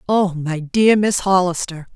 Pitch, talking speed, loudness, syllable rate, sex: 180 Hz, 155 wpm, -17 LUFS, 4.0 syllables/s, female